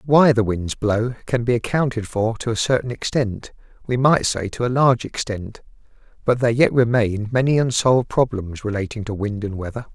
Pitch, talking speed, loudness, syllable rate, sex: 115 Hz, 175 wpm, -20 LUFS, 5.3 syllables/s, male